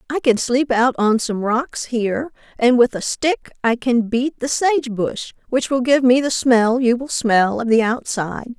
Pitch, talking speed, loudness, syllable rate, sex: 245 Hz, 210 wpm, -18 LUFS, 4.2 syllables/s, female